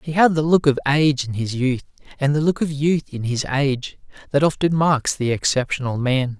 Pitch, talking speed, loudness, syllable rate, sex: 140 Hz, 215 wpm, -20 LUFS, 5.3 syllables/s, male